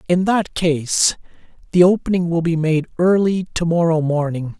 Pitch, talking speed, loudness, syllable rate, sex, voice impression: 170 Hz, 145 wpm, -17 LUFS, 4.7 syllables/s, male, masculine, adult-like, slightly soft, slightly cool, slightly refreshing, sincere, slightly unique